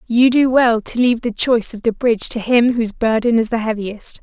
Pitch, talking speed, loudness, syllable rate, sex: 230 Hz, 240 wpm, -16 LUFS, 5.6 syllables/s, female